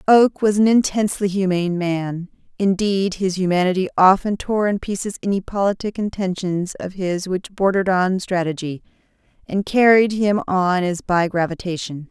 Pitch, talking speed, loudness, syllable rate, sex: 190 Hz, 145 wpm, -19 LUFS, 4.9 syllables/s, female